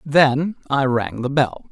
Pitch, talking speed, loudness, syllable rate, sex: 135 Hz, 175 wpm, -19 LUFS, 3.5 syllables/s, male